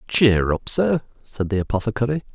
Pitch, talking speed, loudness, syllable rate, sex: 115 Hz, 155 wpm, -21 LUFS, 5.3 syllables/s, male